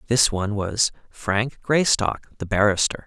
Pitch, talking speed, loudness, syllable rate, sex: 110 Hz, 135 wpm, -22 LUFS, 4.3 syllables/s, male